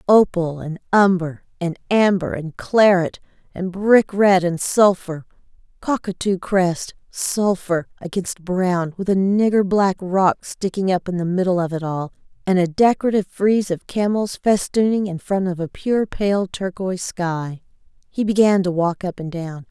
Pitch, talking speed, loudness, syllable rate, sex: 185 Hz, 150 wpm, -19 LUFS, 4.4 syllables/s, female